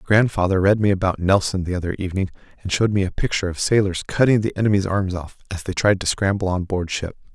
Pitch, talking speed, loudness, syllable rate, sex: 95 Hz, 230 wpm, -20 LUFS, 6.5 syllables/s, male